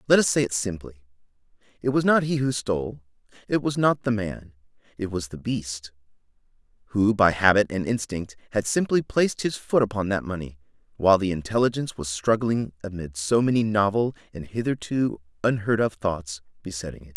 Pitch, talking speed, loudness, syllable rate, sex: 105 Hz, 170 wpm, -24 LUFS, 5.4 syllables/s, male